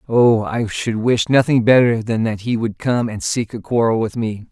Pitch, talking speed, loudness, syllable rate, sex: 115 Hz, 225 wpm, -17 LUFS, 4.6 syllables/s, male